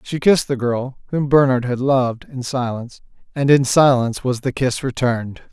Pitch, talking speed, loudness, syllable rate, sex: 130 Hz, 185 wpm, -18 LUFS, 5.3 syllables/s, male